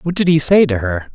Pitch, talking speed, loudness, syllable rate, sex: 145 Hz, 315 wpm, -14 LUFS, 5.6 syllables/s, male